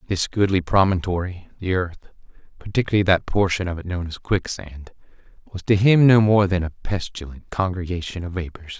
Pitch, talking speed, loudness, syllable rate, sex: 90 Hz, 150 wpm, -21 LUFS, 5.5 syllables/s, male